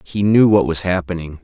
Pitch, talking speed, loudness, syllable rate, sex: 90 Hz, 210 wpm, -15 LUFS, 5.3 syllables/s, male